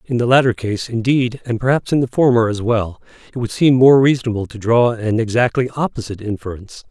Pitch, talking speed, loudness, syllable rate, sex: 120 Hz, 200 wpm, -16 LUFS, 5.9 syllables/s, male